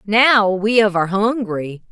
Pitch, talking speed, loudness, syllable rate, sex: 205 Hz, 155 wpm, -16 LUFS, 4.0 syllables/s, female